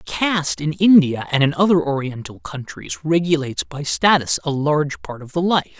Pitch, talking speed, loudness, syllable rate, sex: 150 Hz, 175 wpm, -18 LUFS, 5.1 syllables/s, male